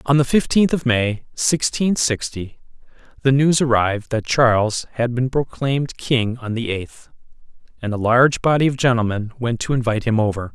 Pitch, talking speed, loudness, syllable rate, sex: 125 Hz, 170 wpm, -19 LUFS, 5.1 syllables/s, male